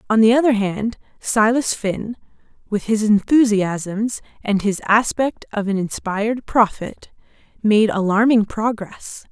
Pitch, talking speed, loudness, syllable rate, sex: 215 Hz, 120 wpm, -18 LUFS, 4.0 syllables/s, female